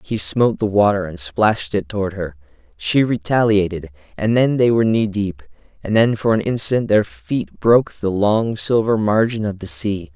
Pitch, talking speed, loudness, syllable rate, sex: 100 Hz, 190 wpm, -18 LUFS, 4.9 syllables/s, male